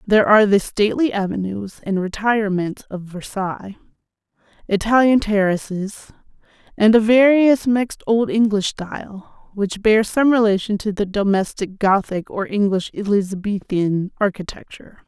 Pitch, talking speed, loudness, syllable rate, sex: 205 Hz, 120 wpm, -18 LUFS, 4.8 syllables/s, female